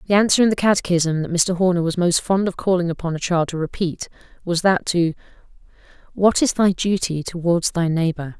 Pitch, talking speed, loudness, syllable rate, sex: 175 Hz, 200 wpm, -19 LUFS, 5.6 syllables/s, female